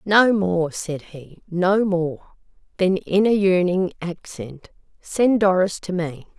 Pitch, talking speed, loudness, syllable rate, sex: 185 Hz, 140 wpm, -20 LUFS, 3.5 syllables/s, female